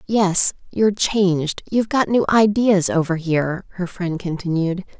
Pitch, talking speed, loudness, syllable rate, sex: 185 Hz, 145 wpm, -19 LUFS, 4.6 syllables/s, female